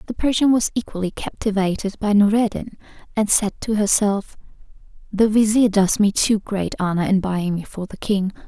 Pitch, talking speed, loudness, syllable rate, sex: 205 Hz, 170 wpm, -20 LUFS, 5.0 syllables/s, female